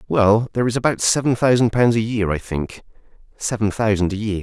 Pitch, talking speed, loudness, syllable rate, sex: 110 Hz, 205 wpm, -19 LUFS, 5.8 syllables/s, male